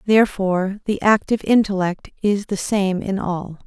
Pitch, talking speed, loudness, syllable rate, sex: 200 Hz, 145 wpm, -20 LUFS, 5.0 syllables/s, female